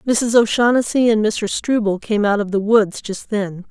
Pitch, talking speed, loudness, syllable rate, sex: 215 Hz, 195 wpm, -17 LUFS, 4.4 syllables/s, female